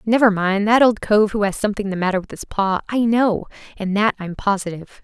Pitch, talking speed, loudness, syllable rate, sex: 205 Hz, 225 wpm, -19 LUFS, 5.8 syllables/s, female